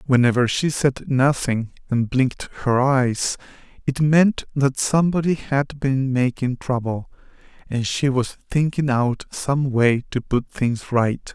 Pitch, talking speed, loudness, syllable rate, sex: 130 Hz, 145 wpm, -21 LUFS, 3.8 syllables/s, male